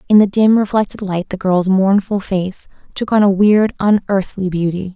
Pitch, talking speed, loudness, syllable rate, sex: 195 Hz, 180 wpm, -15 LUFS, 4.7 syllables/s, female